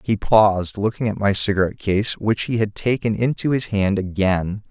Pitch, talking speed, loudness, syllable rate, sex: 105 Hz, 190 wpm, -20 LUFS, 5.0 syllables/s, male